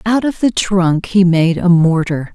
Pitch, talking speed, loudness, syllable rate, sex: 185 Hz, 205 wpm, -13 LUFS, 4.0 syllables/s, female